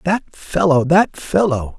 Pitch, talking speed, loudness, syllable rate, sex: 170 Hz, 100 wpm, -17 LUFS, 3.6 syllables/s, male